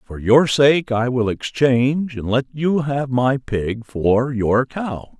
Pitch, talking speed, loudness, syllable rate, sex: 125 Hz, 175 wpm, -18 LUFS, 3.4 syllables/s, male